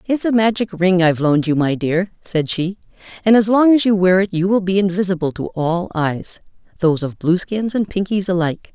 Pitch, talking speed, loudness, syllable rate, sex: 185 Hz, 205 wpm, -17 LUFS, 5.5 syllables/s, female